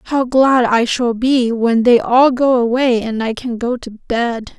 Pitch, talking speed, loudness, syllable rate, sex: 240 Hz, 210 wpm, -15 LUFS, 3.7 syllables/s, female